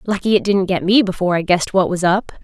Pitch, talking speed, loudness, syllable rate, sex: 190 Hz, 270 wpm, -16 LUFS, 6.7 syllables/s, female